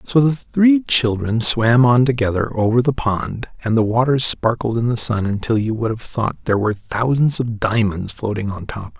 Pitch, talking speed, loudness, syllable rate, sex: 115 Hz, 200 wpm, -18 LUFS, 4.9 syllables/s, male